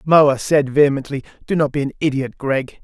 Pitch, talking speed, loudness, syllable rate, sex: 140 Hz, 190 wpm, -18 LUFS, 5.4 syllables/s, male